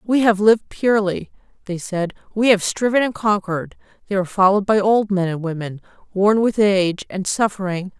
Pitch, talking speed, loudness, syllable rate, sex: 200 Hz, 180 wpm, -19 LUFS, 5.6 syllables/s, female